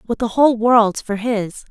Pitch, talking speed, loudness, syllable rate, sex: 225 Hz, 210 wpm, -17 LUFS, 4.3 syllables/s, female